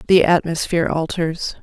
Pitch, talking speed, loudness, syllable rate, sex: 165 Hz, 110 wpm, -18 LUFS, 5.0 syllables/s, female